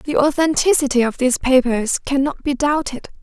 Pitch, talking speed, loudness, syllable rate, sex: 275 Hz, 150 wpm, -17 LUFS, 5.2 syllables/s, female